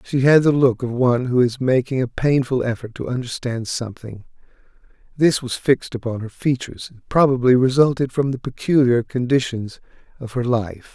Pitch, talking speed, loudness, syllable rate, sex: 125 Hz, 170 wpm, -19 LUFS, 5.4 syllables/s, male